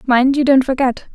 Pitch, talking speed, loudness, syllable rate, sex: 265 Hz, 210 wpm, -15 LUFS, 4.9 syllables/s, female